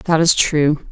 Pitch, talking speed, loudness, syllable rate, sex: 155 Hz, 195 wpm, -15 LUFS, 3.5 syllables/s, female